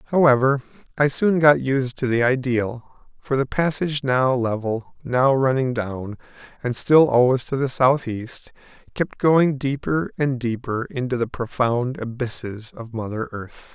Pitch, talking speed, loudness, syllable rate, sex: 125 Hz, 150 wpm, -21 LUFS, 4.2 syllables/s, male